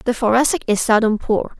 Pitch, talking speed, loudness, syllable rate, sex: 230 Hz, 190 wpm, -17 LUFS, 5.6 syllables/s, female